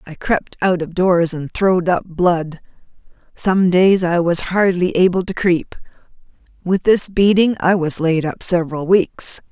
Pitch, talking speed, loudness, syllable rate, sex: 180 Hz, 165 wpm, -16 LUFS, 4.2 syllables/s, female